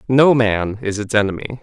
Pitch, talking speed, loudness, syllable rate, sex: 115 Hz, 185 wpm, -17 LUFS, 5.5 syllables/s, male